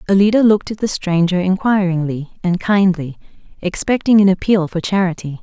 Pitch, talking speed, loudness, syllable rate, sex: 185 Hz, 145 wpm, -16 LUFS, 5.5 syllables/s, female